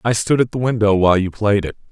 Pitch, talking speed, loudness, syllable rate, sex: 105 Hz, 280 wpm, -17 LUFS, 6.5 syllables/s, male